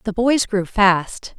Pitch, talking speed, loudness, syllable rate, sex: 205 Hz, 175 wpm, -17 LUFS, 3.2 syllables/s, female